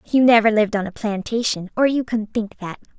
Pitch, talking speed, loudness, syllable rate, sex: 220 Hz, 220 wpm, -19 LUFS, 5.7 syllables/s, female